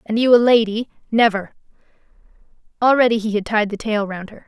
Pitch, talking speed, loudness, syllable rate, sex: 220 Hz, 175 wpm, -17 LUFS, 5.9 syllables/s, female